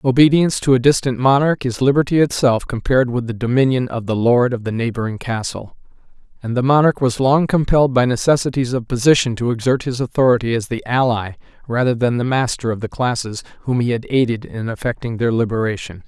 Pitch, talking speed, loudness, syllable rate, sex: 125 Hz, 190 wpm, -17 LUFS, 6.0 syllables/s, male